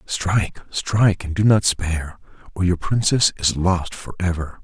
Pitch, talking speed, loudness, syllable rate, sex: 90 Hz, 170 wpm, -20 LUFS, 4.6 syllables/s, male